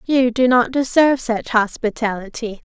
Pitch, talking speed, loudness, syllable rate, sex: 240 Hz, 135 wpm, -18 LUFS, 4.8 syllables/s, female